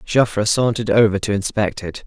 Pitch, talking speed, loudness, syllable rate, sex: 105 Hz, 175 wpm, -18 LUFS, 5.9 syllables/s, male